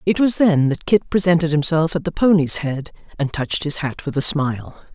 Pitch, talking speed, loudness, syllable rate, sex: 160 Hz, 220 wpm, -18 LUFS, 5.4 syllables/s, female